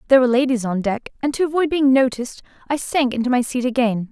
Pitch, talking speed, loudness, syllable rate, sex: 255 Hz, 235 wpm, -19 LUFS, 6.8 syllables/s, female